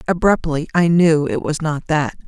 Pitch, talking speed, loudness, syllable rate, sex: 155 Hz, 185 wpm, -17 LUFS, 4.6 syllables/s, female